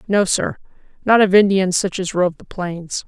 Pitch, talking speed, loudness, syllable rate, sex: 185 Hz, 195 wpm, -17 LUFS, 4.5 syllables/s, female